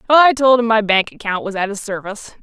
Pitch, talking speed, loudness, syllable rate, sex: 220 Hz, 250 wpm, -16 LUFS, 6.0 syllables/s, female